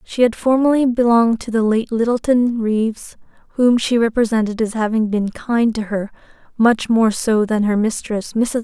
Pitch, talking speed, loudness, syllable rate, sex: 225 Hz, 175 wpm, -17 LUFS, 4.8 syllables/s, female